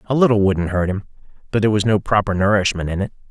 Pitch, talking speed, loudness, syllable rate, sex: 100 Hz, 235 wpm, -18 LUFS, 7.0 syllables/s, male